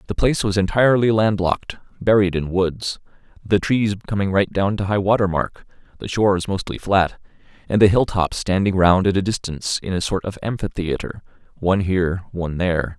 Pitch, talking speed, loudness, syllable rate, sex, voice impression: 95 Hz, 180 wpm, -20 LUFS, 5.6 syllables/s, male, very masculine, very adult-like, very middle-aged, very thick, tensed, very powerful, slightly bright, slightly soft, slightly muffled, very fluent, very cool, very intellectual, slightly refreshing, very sincere, very calm, very mature, very friendly, reassuring, unique, elegant, slightly wild, very lively, kind, slightly intense